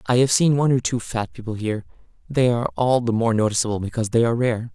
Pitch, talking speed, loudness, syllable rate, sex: 120 Hz, 230 wpm, -21 LUFS, 7.0 syllables/s, male